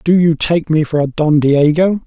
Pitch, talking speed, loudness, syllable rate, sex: 160 Hz, 235 wpm, -13 LUFS, 4.6 syllables/s, male